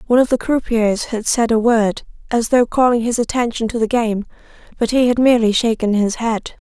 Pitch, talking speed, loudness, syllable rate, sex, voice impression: 230 Hz, 205 wpm, -17 LUFS, 5.5 syllables/s, female, feminine, slightly young, slightly relaxed, slightly weak, soft, slightly raspy, slightly cute, calm, friendly, reassuring, kind, modest